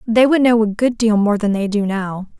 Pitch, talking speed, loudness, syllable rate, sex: 215 Hz, 275 wpm, -16 LUFS, 5.0 syllables/s, female